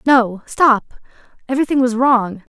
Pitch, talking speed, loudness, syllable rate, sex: 245 Hz, 120 wpm, -16 LUFS, 4.7 syllables/s, female